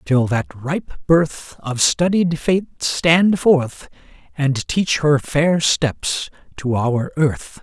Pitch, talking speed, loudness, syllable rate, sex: 150 Hz, 135 wpm, -18 LUFS, 2.7 syllables/s, male